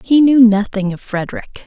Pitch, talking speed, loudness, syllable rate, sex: 225 Hz, 180 wpm, -14 LUFS, 5.1 syllables/s, female